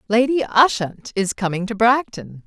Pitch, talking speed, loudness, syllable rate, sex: 220 Hz, 145 wpm, -19 LUFS, 4.5 syllables/s, female